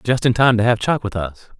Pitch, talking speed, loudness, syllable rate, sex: 115 Hz, 300 wpm, -17 LUFS, 5.6 syllables/s, male